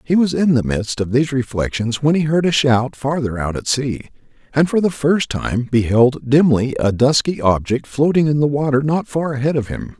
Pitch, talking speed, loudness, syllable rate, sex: 135 Hz, 215 wpm, -17 LUFS, 5.0 syllables/s, male